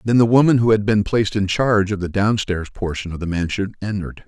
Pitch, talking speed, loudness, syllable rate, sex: 105 Hz, 240 wpm, -19 LUFS, 6.2 syllables/s, male